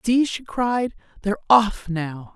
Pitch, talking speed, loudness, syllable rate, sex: 205 Hz, 155 wpm, -22 LUFS, 3.8 syllables/s, female